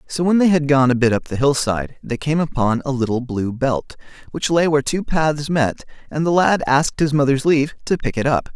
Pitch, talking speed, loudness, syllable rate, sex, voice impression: 140 Hz, 245 wpm, -18 LUFS, 5.5 syllables/s, male, very masculine, slightly young, very adult-like, very thick, tensed, very powerful, very bright, soft, very clear, fluent, very cool, intellectual, very refreshing, very sincere, slightly calm, very friendly, very reassuring, unique, elegant, slightly wild, sweet, very lively, very kind, intense, slightly modest